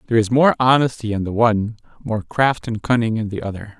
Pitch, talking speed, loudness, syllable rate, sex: 115 Hz, 220 wpm, -19 LUFS, 6.1 syllables/s, male